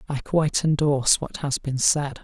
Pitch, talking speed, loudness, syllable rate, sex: 145 Hz, 190 wpm, -22 LUFS, 4.9 syllables/s, male